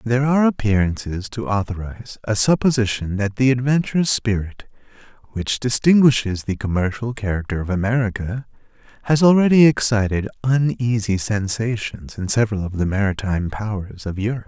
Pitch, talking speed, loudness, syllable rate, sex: 110 Hz, 130 wpm, -19 LUFS, 5.6 syllables/s, male